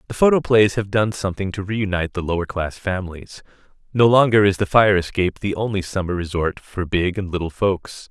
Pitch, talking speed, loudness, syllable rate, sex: 95 Hz, 190 wpm, -20 LUFS, 5.7 syllables/s, male